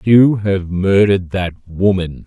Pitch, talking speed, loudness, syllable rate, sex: 95 Hz, 130 wpm, -15 LUFS, 3.7 syllables/s, male